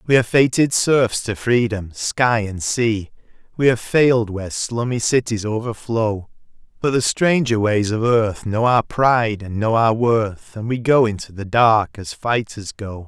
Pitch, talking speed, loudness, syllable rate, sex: 110 Hz, 170 wpm, -18 LUFS, 4.3 syllables/s, male